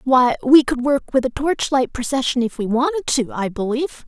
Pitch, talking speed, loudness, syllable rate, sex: 260 Hz, 205 wpm, -19 LUFS, 5.3 syllables/s, female